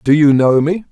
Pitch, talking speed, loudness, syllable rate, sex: 150 Hz, 260 wpm, -12 LUFS, 4.8 syllables/s, male